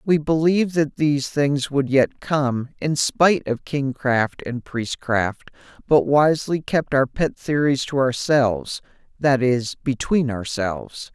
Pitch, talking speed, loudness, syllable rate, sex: 140 Hz, 140 wpm, -21 LUFS, 3.9 syllables/s, male